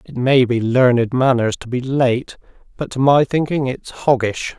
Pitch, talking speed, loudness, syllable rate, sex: 130 Hz, 185 wpm, -17 LUFS, 4.4 syllables/s, male